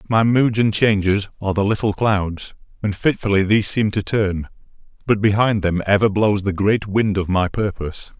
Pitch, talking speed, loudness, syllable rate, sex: 100 Hz, 185 wpm, -19 LUFS, 5.0 syllables/s, male